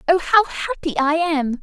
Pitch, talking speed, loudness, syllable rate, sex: 310 Hz, 185 wpm, -19 LUFS, 4.1 syllables/s, female